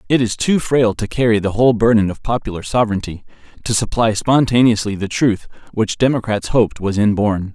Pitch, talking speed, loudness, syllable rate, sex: 110 Hz, 175 wpm, -16 LUFS, 5.7 syllables/s, male